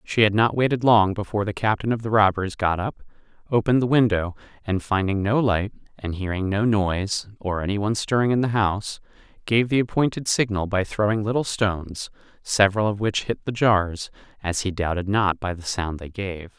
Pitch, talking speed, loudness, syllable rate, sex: 100 Hz, 195 wpm, -22 LUFS, 5.5 syllables/s, male